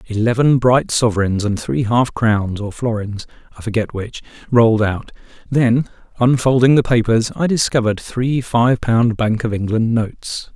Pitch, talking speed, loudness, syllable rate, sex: 115 Hz, 155 wpm, -17 LUFS, 4.6 syllables/s, male